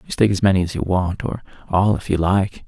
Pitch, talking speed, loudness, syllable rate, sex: 95 Hz, 270 wpm, -19 LUFS, 5.9 syllables/s, male